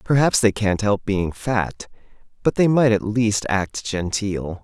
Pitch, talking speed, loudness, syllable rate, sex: 105 Hz, 170 wpm, -20 LUFS, 3.8 syllables/s, male